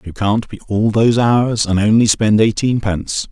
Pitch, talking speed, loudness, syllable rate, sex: 110 Hz, 180 wpm, -15 LUFS, 4.8 syllables/s, male